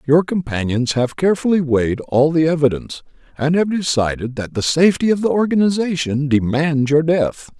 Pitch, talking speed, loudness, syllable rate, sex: 155 Hz, 160 wpm, -17 LUFS, 5.4 syllables/s, male